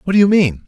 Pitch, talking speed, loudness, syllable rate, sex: 165 Hz, 355 wpm, -13 LUFS, 7.3 syllables/s, male